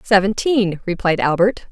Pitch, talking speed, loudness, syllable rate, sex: 195 Hz, 105 wpm, -17 LUFS, 4.5 syllables/s, female